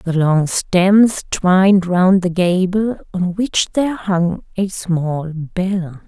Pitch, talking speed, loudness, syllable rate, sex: 185 Hz, 140 wpm, -16 LUFS, 3.1 syllables/s, female